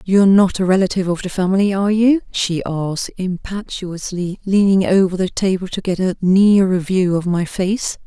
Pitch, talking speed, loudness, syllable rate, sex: 190 Hz, 180 wpm, -17 LUFS, 5.1 syllables/s, female